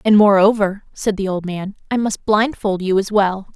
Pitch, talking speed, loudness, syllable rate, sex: 200 Hz, 205 wpm, -17 LUFS, 4.7 syllables/s, female